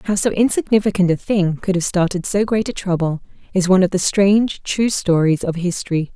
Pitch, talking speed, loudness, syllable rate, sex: 190 Hz, 205 wpm, -18 LUFS, 5.7 syllables/s, female